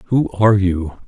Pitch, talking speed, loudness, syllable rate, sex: 100 Hz, 170 wpm, -16 LUFS, 4.0 syllables/s, male